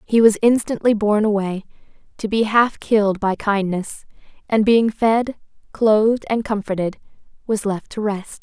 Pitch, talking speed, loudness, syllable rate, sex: 215 Hz, 150 wpm, -19 LUFS, 4.5 syllables/s, female